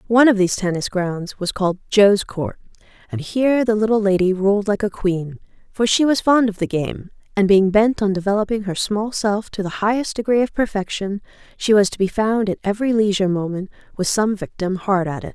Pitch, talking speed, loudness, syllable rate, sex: 205 Hz, 210 wpm, -19 LUFS, 5.6 syllables/s, female